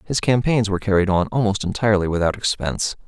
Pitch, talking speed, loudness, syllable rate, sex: 100 Hz, 175 wpm, -20 LUFS, 6.6 syllables/s, male